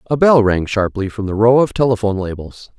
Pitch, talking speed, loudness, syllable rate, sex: 110 Hz, 215 wpm, -15 LUFS, 5.8 syllables/s, male